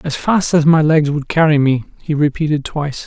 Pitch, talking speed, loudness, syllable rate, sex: 150 Hz, 215 wpm, -15 LUFS, 5.4 syllables/s, male